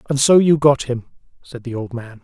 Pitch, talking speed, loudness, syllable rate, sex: 130 Hz, 240 wpm, -17 LUFS, 5.2 syllables/s, male